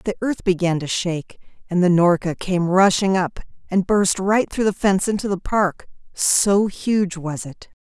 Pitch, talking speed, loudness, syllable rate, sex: 185 Hz, 185 wpm, -19 LUFS, 4.4 syllables/s, female